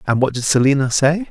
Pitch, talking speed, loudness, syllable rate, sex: 140 Hz, 230 wpm, -16 LUFS, 6.1 syllables/s, male